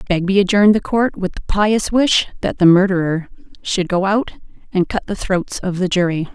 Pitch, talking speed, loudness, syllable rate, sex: 190 Hz, 200 wpm, -17 LUFS, 5.2 syllables/s, female